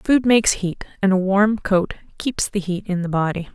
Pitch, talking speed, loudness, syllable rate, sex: 195 Hz, 220 wpm, -20 LUFS, 5.0 syllables/s, female